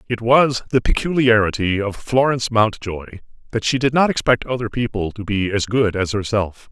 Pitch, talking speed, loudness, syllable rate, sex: 115 Hz, 180 wpm, -19 LUFS, 5.1 syllables/s, male